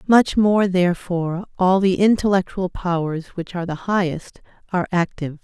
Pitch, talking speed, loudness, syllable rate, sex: 185 Hz, 145 wpm, -20 LUFS, 5.3 syllables/s, female